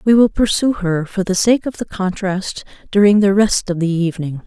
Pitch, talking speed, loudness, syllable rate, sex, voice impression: 195 Hz, 215 wpm, -16 LUFS, 5.1 syllables/s, female, very feminine, slightly young, very adult-like, thin, tensed, powerful, dark, hard, very clear, very fluent, slightly raspy, cute, very intellectual, refreshing, sincere, very calm, friendly, reassuring, very unique, very elegant, wild, very sweet, slightly lively, slightly strict, slightly intense, slightly modest, light